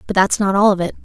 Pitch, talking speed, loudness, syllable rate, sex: 195 Hz, 345 wpm, -15 LUFS, 7.2 syllables/s, female